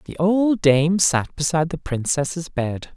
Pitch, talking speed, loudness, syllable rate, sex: 160 Hz, 160 wpm, -20 LUFS, 3.9 syllables/s, male